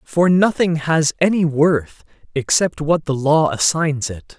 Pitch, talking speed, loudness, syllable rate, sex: 155 Hz, 150 wpm, -17 LUFS, 3.8 syllables/s, male